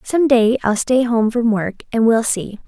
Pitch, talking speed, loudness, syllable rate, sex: 230 Hz, 225 wpm, -16 LUFS, 4.2 syllables/s, female